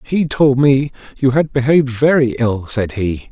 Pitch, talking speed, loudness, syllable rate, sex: 130 Hz, 180 wpm, -15 LUFS, 4.4 syllables/s, male